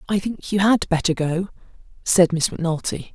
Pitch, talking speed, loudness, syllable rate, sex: 180 Hz, 170 wpm, -21 LUFS, 5.0 syllables/s, female